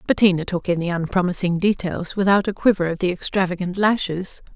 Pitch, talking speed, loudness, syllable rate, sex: 185 Hz, 170 wpm, -21 LUFS, 5.8 syllables/s, female